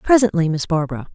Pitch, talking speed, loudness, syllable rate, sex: 180 Hz, 160 wpm, -18 LUFS, 7.1 syllables/s, female